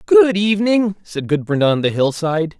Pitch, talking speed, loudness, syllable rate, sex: 180 Hz, 185 wpm, -17 LUFS, 4.6 syllables/s, male